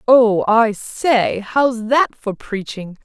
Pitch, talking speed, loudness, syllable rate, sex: 225 Hz, 140 wpm, -17 LUFS, 2.8 syllables/s, female